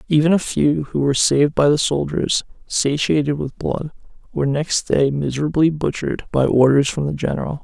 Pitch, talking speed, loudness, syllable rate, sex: 145 Hz, 175 wpm, -18 LUFS, 5.5 syllables/s, male